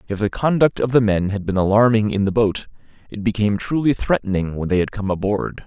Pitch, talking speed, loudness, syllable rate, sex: 105 Hz, 220 wpm, -19 LUFS, 5.9 syllables/s, male